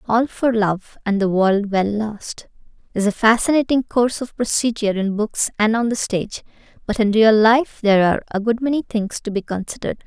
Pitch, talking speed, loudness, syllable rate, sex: 220 Hz, 195 wpm, -19 LUFS, 5.4 syllables/s, female